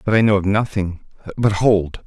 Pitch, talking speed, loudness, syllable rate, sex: 100 Hz, 205 wpm, -18 LUFS, 5.0 syllables/s, male